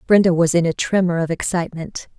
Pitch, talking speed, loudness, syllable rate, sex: 170 Hz, 190 wpm, -18 LUFS, 6.1 syllables/s, female